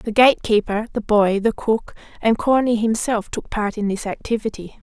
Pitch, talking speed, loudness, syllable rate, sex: 220 Hz, 185 wpm, -20 LUFS, 4.7 syllables/s, female